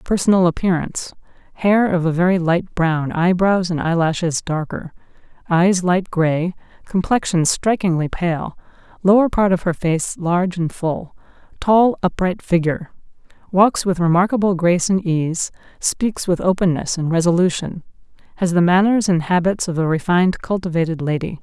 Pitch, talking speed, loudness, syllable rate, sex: 180 Hz, 135 wpm, -18 LUFS, 4.9 syllables/s, female